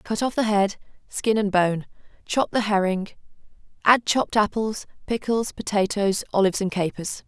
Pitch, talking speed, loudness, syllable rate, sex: 205 Hz, 150 wpm, -23 LUFS, 4.9 syllables/s, female